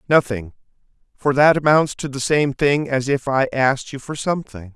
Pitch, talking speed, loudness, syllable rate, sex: 135 Hz, 190 wpm, -19 LUFS, 5.1 syllables/s, male